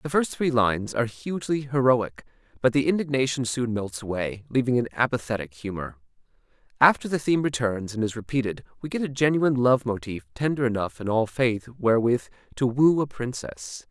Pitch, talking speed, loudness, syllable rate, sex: 125 Hz, 175 wpm, -25 LUFS, 5.6 syllables/s, male